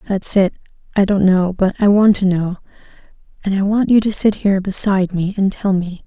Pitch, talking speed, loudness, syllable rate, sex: 195 Hz, 220 wpm, -16 LUFS, 5.6 syllables/s, female